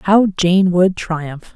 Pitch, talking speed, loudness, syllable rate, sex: 180 Hz, 155 wpm, -15 LUFS, 2.7 syllables/s, female